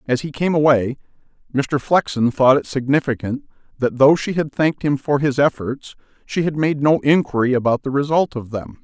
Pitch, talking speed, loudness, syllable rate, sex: 140 Hz, 190 wpm, -18 LUFS, 5.2 syllables/s, male